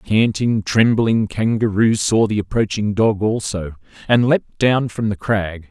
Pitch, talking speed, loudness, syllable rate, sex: 105 Hz, 160 wpm, -18 LUFS, 4.5 syllables/s, male